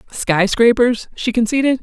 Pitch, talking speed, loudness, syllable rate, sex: 235 Hz, 130 wpm, -16 LUFS, 4.6 syllables/s, male